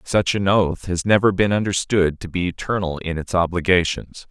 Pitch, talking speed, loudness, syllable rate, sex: 90 Hz, 180 wpm, -20 LUFS, 5.0 syllables/s, male